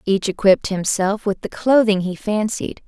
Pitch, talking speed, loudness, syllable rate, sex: 205 Hz, 165 wpm, -19 LUFS, 4.7 syllables/s, female